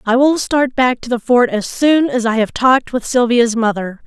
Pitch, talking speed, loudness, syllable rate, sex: 245 Hz, 235 wpm, -15 LUFS, 4.8 syllables/s, female